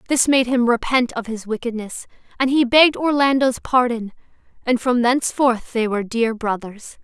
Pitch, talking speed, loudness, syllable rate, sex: 240 Hz, 160 wpm, -19 LUFS, 5.0 syllables/s, female